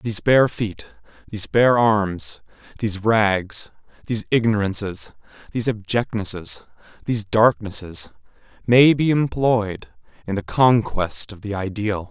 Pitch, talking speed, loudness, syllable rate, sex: 105 Hz, 115 wpm, -20 LUFS, 4.3 syllables/s, male